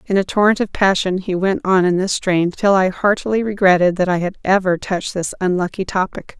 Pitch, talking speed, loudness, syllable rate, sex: 190 Hz, 215 wpm, -17 LUFS, 5.5 syllables/s, female